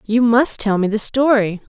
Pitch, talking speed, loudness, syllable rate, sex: 225 Hz, 205 wpm, -16 LUFS, 4.6 syllables/s, female